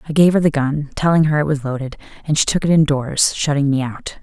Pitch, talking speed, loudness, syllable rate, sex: 145 Hz, 255 wpm, -17 LUFS, 5.9 syllables/s, female